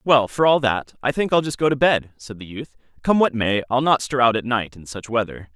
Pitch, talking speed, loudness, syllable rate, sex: 125 Hz, 280 wpm, -20 LUFS, 5.4 syllables/s, male